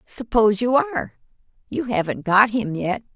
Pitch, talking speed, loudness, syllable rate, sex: 220 Hz, 150 wpm, -21 LUFS, 5.0 syllables/s, female